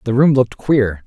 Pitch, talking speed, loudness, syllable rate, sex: 120 Hz, 225 wpm, -15 LUFS, 5.3 syllables/s, male